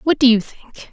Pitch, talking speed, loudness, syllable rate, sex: 255 Hz, 260 wpm, -15 LUFS, 4.9 syllables/s, female